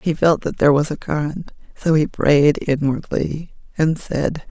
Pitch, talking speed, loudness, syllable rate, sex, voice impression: 150 Hz, 175 wpm, -19 LUFS, 4.3 syllables/s, female, feminine, gender-neutral, very adult-like, middle-aged, slightly thick, very relaxed, very weak, dark, very hard, very muffled, halting, very raspy, cool, intellectual, sincere, slightly calm, slightly mature, slightly friendly, slightly reassuring, very unique, very wild, very strict, very modest